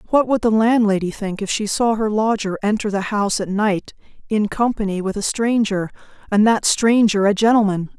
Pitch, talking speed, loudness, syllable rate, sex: 210 Hz, 190 wpm, -18 LUFS, 5.2 syllables/s, female